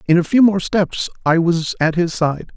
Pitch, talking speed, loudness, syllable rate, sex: 175 Hz, 235 wpm, -17 LUFS, 4.6 syllables/s, male